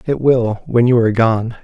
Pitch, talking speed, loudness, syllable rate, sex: 120 Hz, 220 wpm, -15 LUFS, 4.9 syllables/s, male